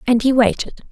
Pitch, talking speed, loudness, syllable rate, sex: 245 Hz, 195 wpm, -16 LUFS, 5.3 syllables/s, female